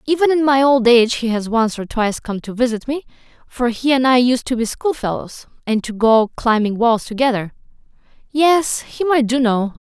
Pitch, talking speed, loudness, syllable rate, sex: 245 Hz, 200 wpm, -17 LUFS, 5.1 syllables/s, female